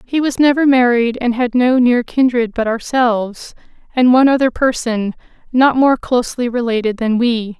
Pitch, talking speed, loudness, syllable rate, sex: 245 Hz, 165 wpm, -15 LUFS, 4.9 syllables/s, female